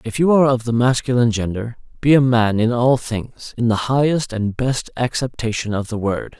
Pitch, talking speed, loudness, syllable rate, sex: 120 Hz, 205 wpm, -18 LUFS, 5.2 syllables/s, male